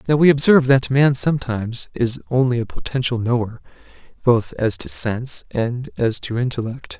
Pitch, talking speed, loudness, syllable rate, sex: 125 Hz, 165 wpm, -19 LUFS, 5.2 syllables/s, male